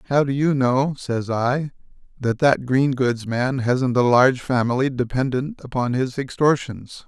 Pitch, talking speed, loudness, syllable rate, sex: 130 Hz, 160 wpm, -20 LUFS, 4.3 syllables/s, male